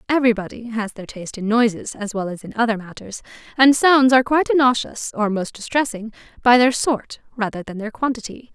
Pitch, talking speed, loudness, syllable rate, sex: 230 Hz, 190 wpm, -19 LUFS, 5.9 syllables/s, female